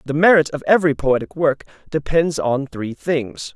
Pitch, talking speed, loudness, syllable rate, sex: 145 Hz, 170 wpm, -18 LUFS, 4.7 syllables/s, male